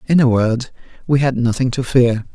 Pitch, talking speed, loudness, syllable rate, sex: 125 Hz, 205 wpm, -16 LUFS, 5.0 syllables/s, male